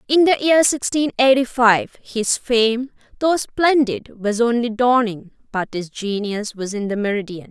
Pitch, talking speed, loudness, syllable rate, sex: 235 Hz, 160 wpm, -19 LUFS, 4.2 syllables/s, female